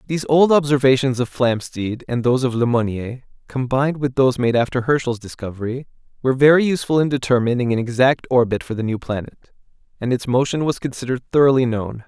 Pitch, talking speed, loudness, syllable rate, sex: 125 Hz, 180 wpm, -19 LUFS, 6.3 syllables/s, male